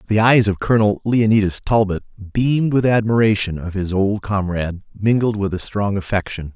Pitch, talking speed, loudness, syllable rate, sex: 105 Hz, 165 wpm, -18 LUFS, 5.3 syllables/s, male